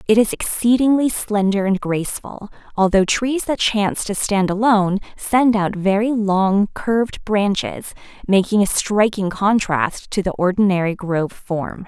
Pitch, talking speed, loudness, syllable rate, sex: 205 Hz, 140 wpm, -18 LUFS, 4.4 syllables/s, female